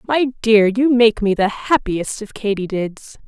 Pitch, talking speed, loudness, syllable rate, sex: 220 Hz, 185 wpm, -17 LUFS, 4.0 syllables/s, female